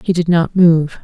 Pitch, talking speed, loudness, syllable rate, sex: 170 Hz, 230 wpm, -13 LUFS, 4.4 syllables/s, female